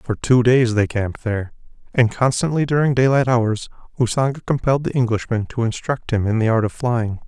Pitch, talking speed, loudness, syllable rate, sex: 120 Hz, 190 wpm, -19 LUFS, 5.5 syllables/s, male